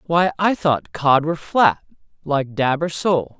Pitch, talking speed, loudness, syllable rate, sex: 150 Hz, 175 wpm, -19 LUFS, 3.9 syllables/s, male